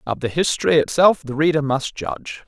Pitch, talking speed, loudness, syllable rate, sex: 150 Hz, 195 wpm, -19 LUFS, 5.6 syllables/s, male